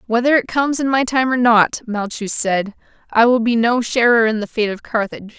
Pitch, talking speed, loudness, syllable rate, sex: 235 Hz, 225 wpm, -17 LUFS, 5.4 syllables/s, female